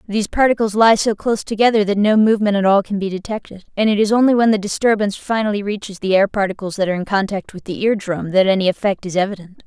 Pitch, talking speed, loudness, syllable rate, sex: 205 Hz, 240 wpm, -17 LUFS, 6.8 syllables/s, female